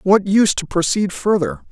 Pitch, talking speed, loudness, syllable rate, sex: 195 Hz, 175 wpm, -17 LUFS, 5.1 syllables/s, female